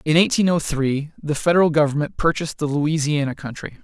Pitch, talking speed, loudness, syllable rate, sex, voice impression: 155 Hz, 170 wpm, -20 LUFS, 5.8 syllables/s, male, very masculine, slightly middle-aged, slightly thick, very tensed, powerful, very bright, slightly hard, clear, very fluent, slightly raspy, cool, slightly intellectual, very refreshing, sincere, slightly calm, slightly mature, friendly, reassuring, very unique, slightly elegant, wild, slightly sweet, very lively, kind, intense, slightly light